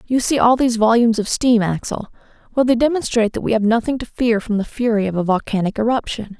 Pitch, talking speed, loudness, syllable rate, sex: 230 Hz, 225 wpm, -18 LUFS, 6.4 syllables/s, female